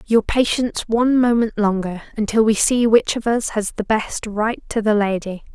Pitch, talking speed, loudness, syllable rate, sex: 220 Hz, 195 wpm, -19 LUFS, 4.9 syllables/s, female